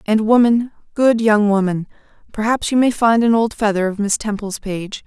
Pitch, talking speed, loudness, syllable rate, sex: 215 Hz, 190 wpm, -17 LUFS, 4.9 syllables/s, female